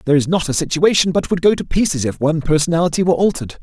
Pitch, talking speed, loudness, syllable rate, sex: 160 Hz, 250 wpm, -16 LUFS, 7.8 syllables/s, male